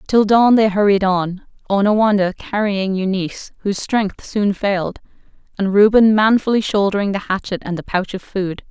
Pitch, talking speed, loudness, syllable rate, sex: 200 Hz, 160 wpm, -17 LUFS, 5.0 syllables/s, female